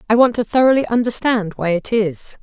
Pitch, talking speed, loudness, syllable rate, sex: 220 Hz, 200 wpm, -17 LUFS, 5.4 syllables/s, female